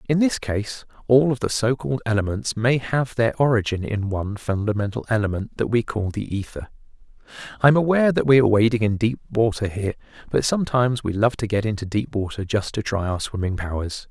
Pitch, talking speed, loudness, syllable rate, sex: 110 Hz, 200 wpm, -22 LUFS, 5.9 syllables/s, male